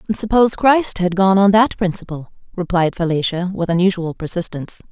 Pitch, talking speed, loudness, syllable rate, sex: 185 Hz, 145 wpm, -17 LUFS, 5.5 syllables/s, female